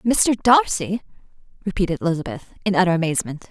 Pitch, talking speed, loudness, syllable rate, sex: 185 Hz, 120 wpm, -20 LUFS, 6.6 syllables/s, female